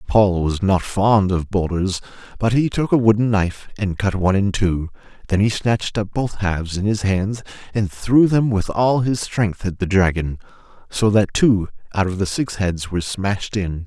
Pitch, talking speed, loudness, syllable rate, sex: 100 Hz, 205 wpm, -19 LUFS, 4.8 syllables/s, male